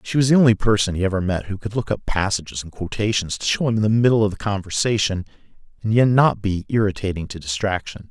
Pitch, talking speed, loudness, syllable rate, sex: 105 Hz, 230 wpm, -20 LUFS, 6.4 syllables/s, male